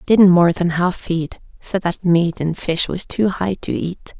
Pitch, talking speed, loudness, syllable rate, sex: 175 Hz, 215 wpm, -18 LUFS, 3.9 syllables/s, female